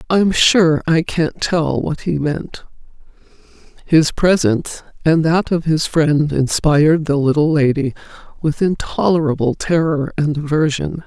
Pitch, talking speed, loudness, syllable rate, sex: 155 Hz, 130 wpm, -16 LUFS, 4.2 syllables/s, female